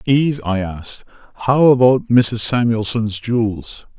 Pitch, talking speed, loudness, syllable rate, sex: 120 Hz, 120 wpm, -16 LUFS, 4.4 syllables/s, male